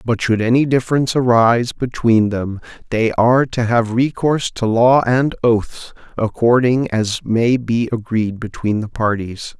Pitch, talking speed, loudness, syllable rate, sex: 115 Hz, 150 wpm, -16 LUFS, 4.4 syllables/s, male